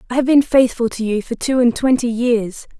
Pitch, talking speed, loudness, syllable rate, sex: 240 Hz, 235 wpm, -16 LUFS, 5.2 syllables/s, female